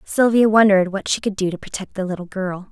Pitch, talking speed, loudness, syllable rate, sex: 195 Hz, 245 wpm, -19 LUFS, 6.1 syllables/s, female